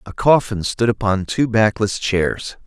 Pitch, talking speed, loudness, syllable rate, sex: 105 Hz, 160 wpm, -18 LUFS, 4.0 syllables/s, male